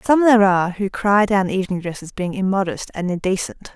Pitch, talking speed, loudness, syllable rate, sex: 195 Hz, 210 wpm, -19 LUFS, 5.9 syllables/s, female